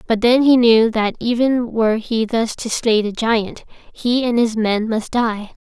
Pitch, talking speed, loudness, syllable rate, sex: 230 Hz, 205 wpm, -17 LUFS, 4.1 syllables/s, female